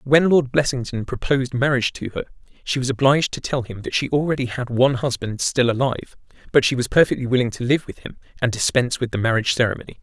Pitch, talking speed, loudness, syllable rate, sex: 125 Hz, 215 wpm, -20 LUFS, 6.7 syllables/s, male